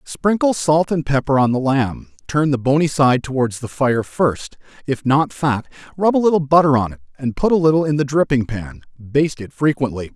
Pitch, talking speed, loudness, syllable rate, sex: 140 Hz, 205 wpm, -18 LUFS, 5.2 syllables/s, male